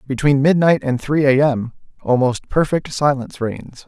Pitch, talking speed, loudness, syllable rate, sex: 135 Hz, 155 wpm, -17 LUFS, 4.6 syllables/s, male